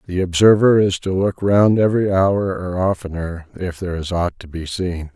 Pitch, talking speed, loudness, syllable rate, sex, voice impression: 90 Hz, 200 wpm, -18 LUFS, 4.9 syllables/s, male, very masculine, very adult-like, very middle-aged, very thick, tensed, powerful, dark, slightly soft, slightly muffled, slightly fluent, very cool, intellectual, very sincere, very calm, very mature, very friendly, very reassuring, unique, slightly elegant, wild, slightly sweet, kind, slightly modest